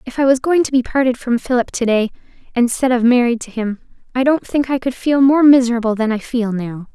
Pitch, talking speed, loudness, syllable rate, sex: 245 Hz, 240 wpm, -16 LUFS, 5.8 syllables/s, female